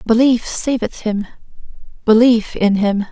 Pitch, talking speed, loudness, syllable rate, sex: 225 Hz, 115 wpm, -16 LUFS, 4.1 syllables/s, female